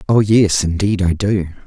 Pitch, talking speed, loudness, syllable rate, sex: 95 Hz, 180 wpm, -15 LUFS, 4.4 syllables/s, male